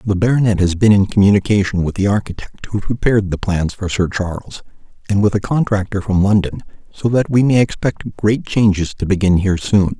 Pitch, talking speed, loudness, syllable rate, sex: 100 Hz, 200 wpm, -16 LUFS, 5.7 syllables/s, male